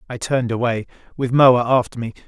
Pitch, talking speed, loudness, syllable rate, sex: 120 Hz, 185 wpm, -18 LUFS, 6.0 syllables/s, male